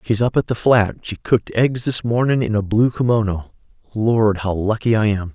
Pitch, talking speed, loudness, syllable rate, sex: 110 Hz, 190 wpm, -18 LUFS, 5.1 syllables/s, male